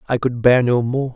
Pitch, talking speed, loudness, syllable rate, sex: 125 Hz, 260 wpm, -17 LUFS, 5.2 syllables/s, male